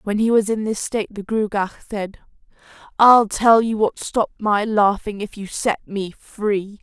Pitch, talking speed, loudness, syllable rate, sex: 210 Hz, 185 wpm, -19 LUFS, 4.4 syllables/s, female